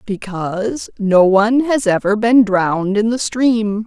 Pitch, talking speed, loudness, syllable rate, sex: 215 Hz, 155 wpm, -15 LUFS, 4.1 syllables/s, female